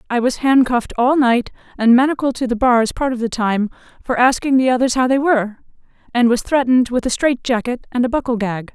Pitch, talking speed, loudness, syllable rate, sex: 245 Hz, 215 wpm, -17 LUFS, 5.9 syllables/s, female